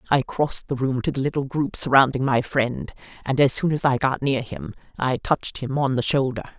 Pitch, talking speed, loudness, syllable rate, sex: 130 Hz, 230 wpm, -22 LUFS, 5.5 syllables/s, female